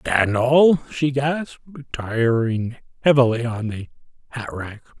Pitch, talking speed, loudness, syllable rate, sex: 125 Hz, 110 wpm, -20 LUFS, 3.9 syllables/s, male